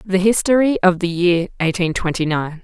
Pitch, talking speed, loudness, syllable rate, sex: 185 Hz, 180 wpm, -17 LUFS, 5.0 syllables/s, female